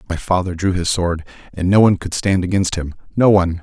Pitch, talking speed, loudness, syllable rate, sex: 90 Hz, 215 wpm, -17 LUFS, 6.1 syllables/s, male